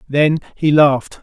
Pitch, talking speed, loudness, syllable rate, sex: 145 Hz, 145 wpm, -15 LUFS, 4.5 syllables/s, male